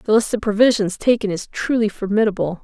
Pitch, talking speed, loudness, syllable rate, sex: 210 Hz, 180 wpm, -19 LUFS, 5.8 syllables/s, female